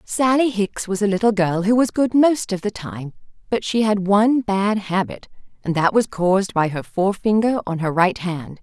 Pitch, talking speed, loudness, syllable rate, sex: 200 Hz, 210 wpm, -19 LUFS, 4.9 syllables/s, female